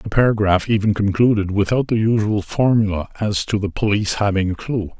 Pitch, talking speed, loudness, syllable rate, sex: 105 Hz, 180 wpm, -18 LUFS, 5.6 syllables/s, male